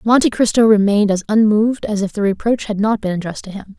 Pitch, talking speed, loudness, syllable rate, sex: 210 Hz, 240 wpm, -16 LUFS, 6.6 syllables/s, female